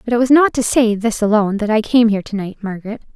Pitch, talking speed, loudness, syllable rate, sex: 220 Hz, 285 wpm, -15 LUFS, 6.9 syllables/s, female